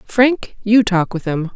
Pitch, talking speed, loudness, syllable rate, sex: 205 Hz, 195 wpm, -16 LUFS, 3.6 syllables/s, female